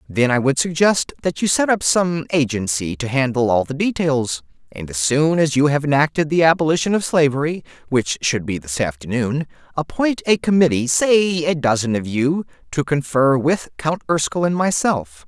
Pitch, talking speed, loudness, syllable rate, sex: 145 Hz, 180 wpm, -18 LUFS, 4.9 syllables/s, male